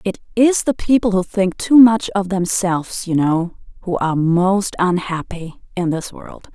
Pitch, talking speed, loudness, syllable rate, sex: 190 Hz, 175 wpm, -17 LUFS, 4.4 syllables/s, female